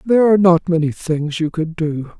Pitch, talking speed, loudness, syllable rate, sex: 170 Hz, 220 wpm, -17 LUFS, 5.4 syllables/s, male